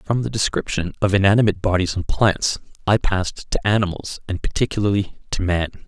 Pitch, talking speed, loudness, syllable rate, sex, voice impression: 100 Hz, 165 wpm, -21 LUFS, 5.9 syllables/s, male, very masculine, very adult-like, middle-aged, very thick, tensed, powerful, bright, soft, slightly muffled, fluent, slightly raspy, very cool, very intellectual, slightly refreshing, very calm, very mature, friendly, reassuring, elegant, slightly sweet, kind, slightly modest